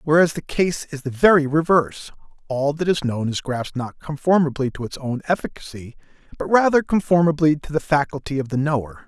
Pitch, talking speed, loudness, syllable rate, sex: 145 Hz, 185 wpm, -20 LUFS, 5.7 syllables/s, male